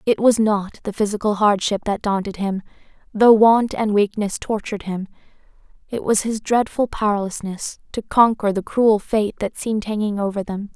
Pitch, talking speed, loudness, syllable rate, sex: 210 Hz, 165 wpm, -20 LUFS, 5.0 syllables/s, female